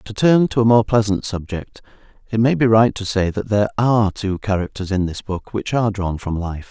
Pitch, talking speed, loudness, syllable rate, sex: 105 Hz, 235 wpm, -19 LUFS, 5.4 syllables/s, male